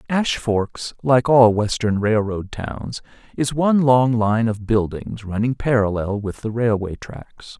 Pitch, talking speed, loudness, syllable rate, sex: 115 Hz, 150 wpm, -19 LUFS, 3.9 syllables/s, male